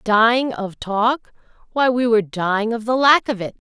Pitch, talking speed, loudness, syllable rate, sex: 230 Hz, 180 wpm, -18 LUFS, 4.9 syllables/s, female